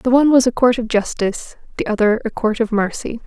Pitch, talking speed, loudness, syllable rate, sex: 230 Hz, 240 wpm, -17 LUFS, 6.1 syllables/s, female